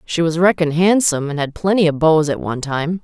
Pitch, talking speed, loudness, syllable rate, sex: 165 Hz, 235 wpm, -16 LUFS, 6.1 syllables/s, female